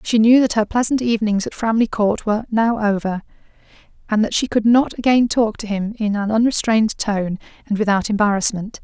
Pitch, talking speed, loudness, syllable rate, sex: 220 Hz, 190 wpm, -18 LUFS, 5.5 syllables/s, female